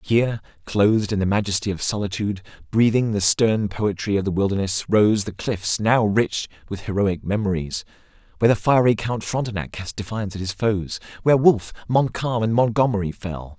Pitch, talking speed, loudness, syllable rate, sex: 105 Hz, 170 wpm, -21 LUFS, 5.4 syllables/s, male